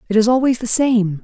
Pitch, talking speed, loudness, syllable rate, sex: 230 Hz, 245 wpm, -16 LUFS, 5.5 syllables/s, female